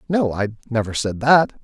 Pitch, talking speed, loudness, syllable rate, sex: 125 Hz, 185 wpm, -20 LUFS, 4.8 syllables/s, male